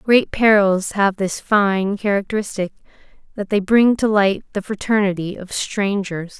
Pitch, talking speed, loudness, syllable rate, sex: 200 Hz, 140 wpm, -18 LUFS, 4.3 syllables/s, female